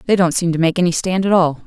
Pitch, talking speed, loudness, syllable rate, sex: 175 Hz, 325 wpm, -16 LUFS, 6.7 syllables/s, female